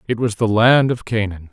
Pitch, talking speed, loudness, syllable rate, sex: 110 Hz, 235 wpm, -17 LUFS, 5.2 syllables/s, male